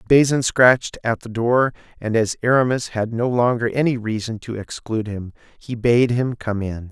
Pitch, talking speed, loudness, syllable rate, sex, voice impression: 115 Hz, 180 wpm, -20 LUFS, 4.9 syllables/s, male, masculine, slightly adult-like, slightly relaxed, slightly bright, soft, refreshing, calm, friendly, unique, kind, slightly modest